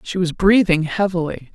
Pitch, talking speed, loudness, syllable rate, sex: 180 Hz, 155 wpm, -18 LUFS, 4.8 syllables/s, female